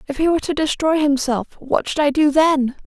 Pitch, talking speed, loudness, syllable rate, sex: 290 Hz, 230 wpm, -18 LUFS, 5.6 syllables/s, female